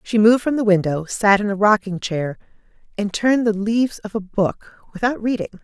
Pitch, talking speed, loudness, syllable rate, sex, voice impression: 210 Hz, 200 wpm, -19 LUFS, 5.7 syllables/s, female, feminine, adult-like, tensed, powerful, clear, fluent, intellectual, friendly, reassuring, lively, slightly strict